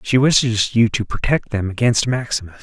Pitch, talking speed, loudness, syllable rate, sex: 115 Hz, 185 wpm, -18 LUFS, 5.1 syllables/s, male